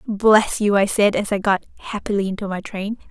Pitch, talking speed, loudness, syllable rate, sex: 205 Hz, 210 wpm, -19 LUFS, 5.2 syllables/s, female